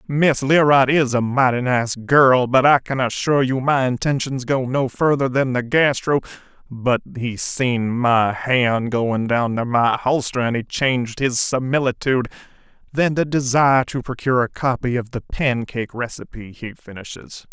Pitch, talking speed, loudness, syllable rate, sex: 130 Hz, 160 wpm, -19 LUFS, 4.5 syllables/s, male